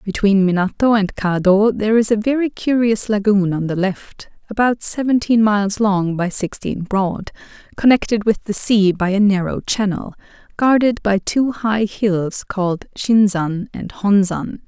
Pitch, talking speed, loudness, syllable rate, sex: 205 Hz, 150 wpm, -17 LUFS, 4.4 syllables/s, female